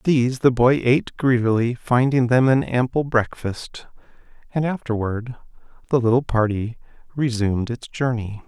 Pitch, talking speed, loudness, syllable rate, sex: 120 Hz, 125 wpm, -21 LUFS, 4.7 syllables/s, male